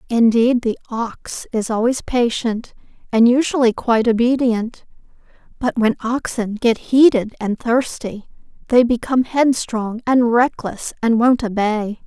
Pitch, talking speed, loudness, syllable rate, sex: 235 Hz, 125 wpm, -18 LUFS, 4.2 syllables/s, female